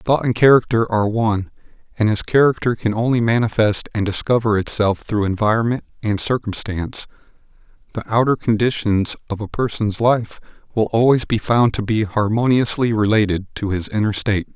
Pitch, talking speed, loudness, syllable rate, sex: 110 Hz, 150 wpm, -18 LUFS, 5.4 syllables/s, male